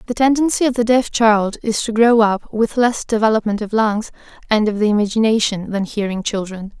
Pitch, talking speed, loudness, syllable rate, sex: 220 Hz, 195 wpm, -17 LUFS, 5.4 syllables/s, female